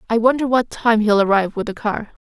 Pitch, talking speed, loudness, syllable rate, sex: 220 Hz, 240 wpm, -18 LUFS, 6.1 syllables/s, female